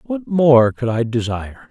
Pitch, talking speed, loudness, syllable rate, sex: 130 Hz, 175 wpm, -16 LUFS, 4.6 syllables/s, male